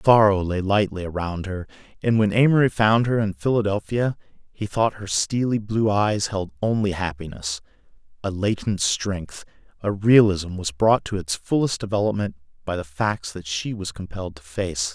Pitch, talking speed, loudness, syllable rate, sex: 100 Hz, 165 wpm, -23 LUFS, 4.8 syllables/s, male